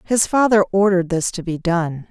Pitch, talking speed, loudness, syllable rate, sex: 185 Hz, 200 wpm, -18 LUFS, 5.2 syllables/s, female